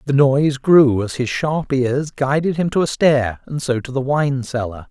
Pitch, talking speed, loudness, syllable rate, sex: 135 Hz, 220 wpm, -18 LUFS, 4.5 syllables/s, male